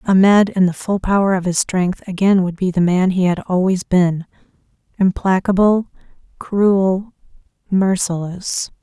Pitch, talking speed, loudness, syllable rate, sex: 190 Hz, 135 wpm, -17 LUFS, 4.3 syllables/s, female